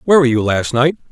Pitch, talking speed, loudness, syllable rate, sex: 135 Hz, 270 wpm, -15 LUFS, 8.2 syllables/s, male